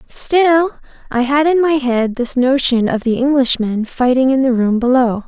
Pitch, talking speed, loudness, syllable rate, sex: 260 Hz, 180 wpm, -14 LUFS, 4.4 syllables/s, female